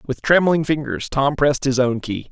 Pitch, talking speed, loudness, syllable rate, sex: 140 Hz, 205 wpm, -19 LUFS, 4.9 syllables/s, male